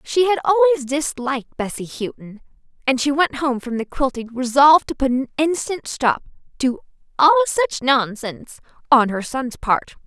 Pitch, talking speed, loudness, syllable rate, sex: 275 Hz, 160 wpm, -19 LUFS, 5.2 syllables/s, female